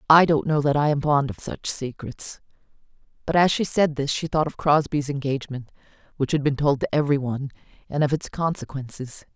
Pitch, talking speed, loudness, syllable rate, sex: 145 Hz, 200 wpm, -23 LUFS, 5.7 syllables/s, female